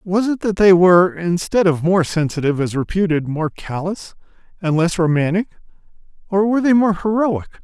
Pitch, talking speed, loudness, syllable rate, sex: 180 Hz, 165 wpm, -17 LUFS, 5.4 syllables/s, male